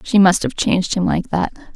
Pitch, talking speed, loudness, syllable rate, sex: 180 Hz, 240 wpm, -17 LUFS, 5.5 syllables/s, female